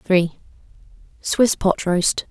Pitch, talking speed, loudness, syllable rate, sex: 185 Hz, 80 wpm, -20 LUFS, 3.0 syllables/s, female